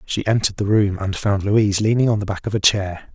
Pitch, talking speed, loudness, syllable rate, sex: 105 Hz, 265 wpm, -19 LUFS, 6.0 syllables/s, male